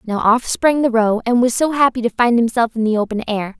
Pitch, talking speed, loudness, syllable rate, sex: 235 Hz, 265 wpm, -16 LUFS, 5.5 syllables/s, female